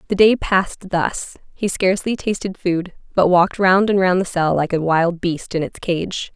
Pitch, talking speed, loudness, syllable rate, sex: 185 Hz, 210 wpm, -18 LUFS, 4.7 syllables/s, female